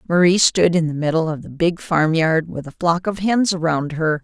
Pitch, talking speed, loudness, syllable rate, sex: 165 Hz, 240 wpm, -18 LUFS, 4.9 syllables/s, female